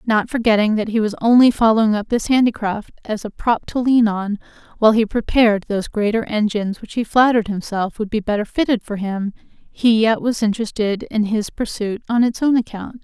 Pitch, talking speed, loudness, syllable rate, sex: 220 Hz, 200 wpm, -18 LUFS, 5.6 syllables/s, female